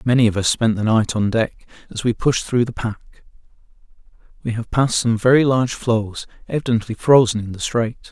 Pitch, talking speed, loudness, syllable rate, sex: 115 Hz, 190 wpm, -19 LUFS, 5.4 syllables/s, male